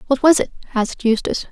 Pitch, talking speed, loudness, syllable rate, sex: 250 Hz, 200 wpm, -18 LUFS, 7.3 syllables/s, female